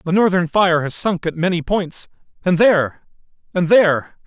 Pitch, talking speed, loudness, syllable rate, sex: 175 Hz, 170 wpm, -17 LUFS, 5.0 syllables/s, male